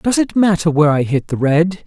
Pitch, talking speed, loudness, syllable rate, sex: 165 Hz, 255 wpm, -15 LUFS, 5.5 syllables/s, male